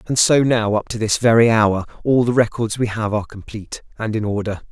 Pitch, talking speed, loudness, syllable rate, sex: 110 Hz, 230 wpm, -18 LUFS, 5.7 syllables/s, male